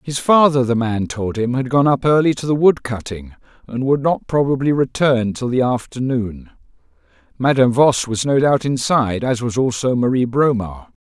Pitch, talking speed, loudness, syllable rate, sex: 125 Hz, 180 wpm, -17 LUFS, 4.9 syllables/s, male